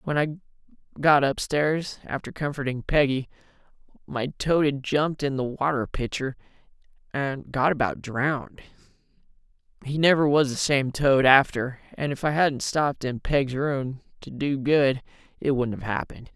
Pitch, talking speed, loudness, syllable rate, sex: 140 Hz, 145 wpm, -24 LUFS, 4.7 syllables/s, male